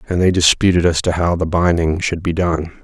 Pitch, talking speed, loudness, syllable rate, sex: 85 Hz, 235 wpm, -16 LUFS, 5.5 syllables/s, male